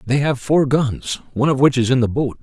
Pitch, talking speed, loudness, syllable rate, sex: 130 Hz, 275 wpm, -18 LUFS, 5.6 syllables/s, male